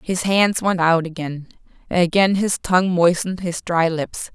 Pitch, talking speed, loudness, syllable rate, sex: 175 Hz, 150 wpm, -19 LUFS, 4.5 syllables/s, female